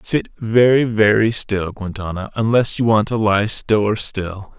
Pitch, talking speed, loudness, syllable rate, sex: 110 Hz, 145 wpm, -17 LUFS, 4.2 syllables/s, male